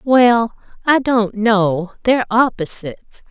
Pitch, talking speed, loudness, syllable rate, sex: 225 Hz, 110 wpm, -16 LUFS, 3.7 syllables/s, female